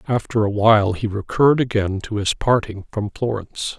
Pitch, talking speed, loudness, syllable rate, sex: 110 Hz, 175 wpm, -20 LUFS, 5.4 syllables/s, male